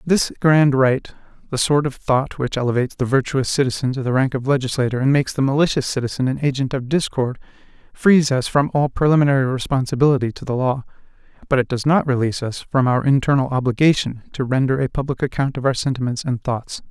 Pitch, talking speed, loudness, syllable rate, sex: 135 Hz, 190 wpm, -19 LUFS, 6.1 syllables/s, male